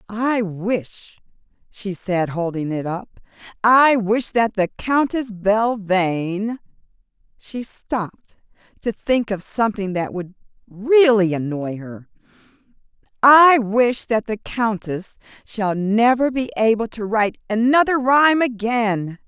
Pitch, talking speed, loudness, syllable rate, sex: 215 Hz, 115 wpm, -19 LUFS, 3.8 syllables/s, female